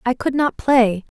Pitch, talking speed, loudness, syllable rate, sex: 250 Hz, 200 wpm, -18 LUFS, 4.1 syllables/s, female